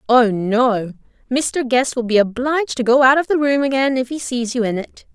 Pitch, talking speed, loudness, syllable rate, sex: 250 Hz, 235 wpm, -17 LUFS, 5.0 syllables/s, female